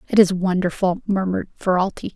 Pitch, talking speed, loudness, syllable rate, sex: 185 Hz, 140 wpm, -20 LUFS, 6.0 syllables/s, female